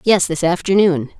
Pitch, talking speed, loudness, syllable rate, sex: 175 Hz, 150 wpm, -16 LUFS, 4.9 syllables/s, female